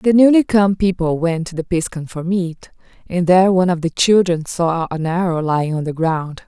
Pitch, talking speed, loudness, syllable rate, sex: 175 Hz, 215 wpm, -17 LUFS, 5.2 syllables/s, female